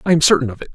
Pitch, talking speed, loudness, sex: 145 Hz, 400 wpm, -15 LUFS, male